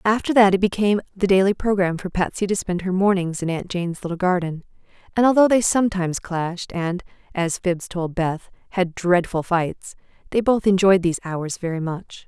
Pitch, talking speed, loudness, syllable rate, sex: 185 Hz, 185 wpm, -21 LUFS, 5.4 syllables/s, female